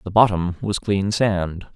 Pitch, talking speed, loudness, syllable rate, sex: 95 Hz, 170 wpm, -21 LUFS, 3.8 syllables/s, male